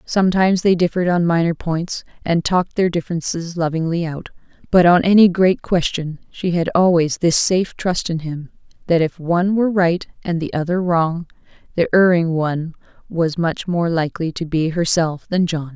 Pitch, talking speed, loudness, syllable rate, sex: 170 Hz, 170 wpm, -18 LUFS, 5.2 syllables/s, female